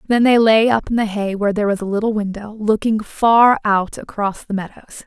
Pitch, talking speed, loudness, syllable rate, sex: 215 Hz, 225 wpm, -17 LUFS, 5.5 syllables/s, female